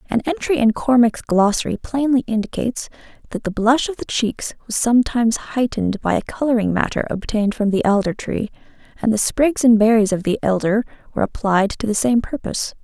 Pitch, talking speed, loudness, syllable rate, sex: 225 Hz, 180 wpm, -19 LUFS, 5.7 syllables/s, female